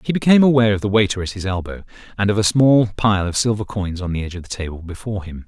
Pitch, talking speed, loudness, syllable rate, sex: 100 Hz, 275 wpm, -18 LUFS, 7.2 syllables/s, male